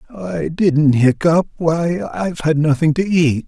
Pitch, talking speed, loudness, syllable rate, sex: 160 Hz, 155 wpm, -16 LUFS, 4.0 syllables/s, male